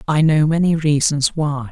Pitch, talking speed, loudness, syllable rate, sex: 150 Hz, 175 wpm, -16 LUFS, 4.5 syllables/s, male